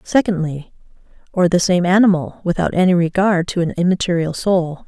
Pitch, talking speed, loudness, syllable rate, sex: 175 Hz, 150 wpm, -17 LUFS, 5.3 syllables/s, female